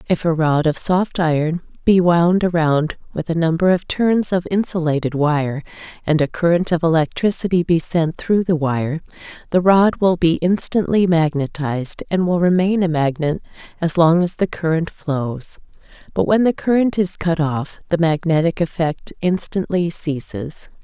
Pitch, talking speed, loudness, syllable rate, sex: 170 Hz, 160 wpm, -18 LUFS, 4.5 syllables/s, female